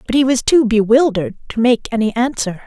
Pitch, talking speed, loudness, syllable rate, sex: 235 Hz, 200 wpm, -15 LUFS, 5.8 syllables/s, female